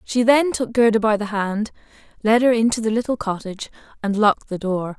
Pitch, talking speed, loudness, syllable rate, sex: 220 Hz, 205 wpm, -20 LUFS, 5.7 syllables/s, female